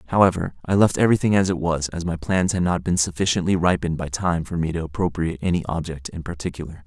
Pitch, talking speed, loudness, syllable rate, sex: 85 Hz, 220 wpm, -22 LUFS, 6.6 syllables/s, male